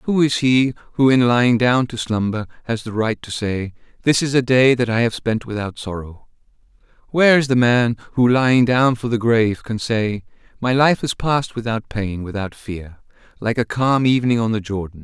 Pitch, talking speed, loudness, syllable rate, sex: 115 Hz, 205 wpm, -18 LUFS, 5.1 syllables/s, male